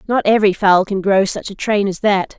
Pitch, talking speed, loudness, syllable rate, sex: 200 Hz, 250 wpm, -16 LUFS, 5.4 syllables/s, female